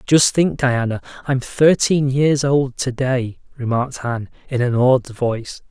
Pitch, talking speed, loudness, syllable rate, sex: 130 Hz, 145 wpm, -18 LUFS, 4.3 syllables/s, male